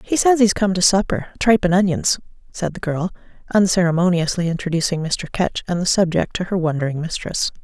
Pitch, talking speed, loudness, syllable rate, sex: 180 Hz, 180 wpm, -19 LUFS, 5.8 syllables/s, female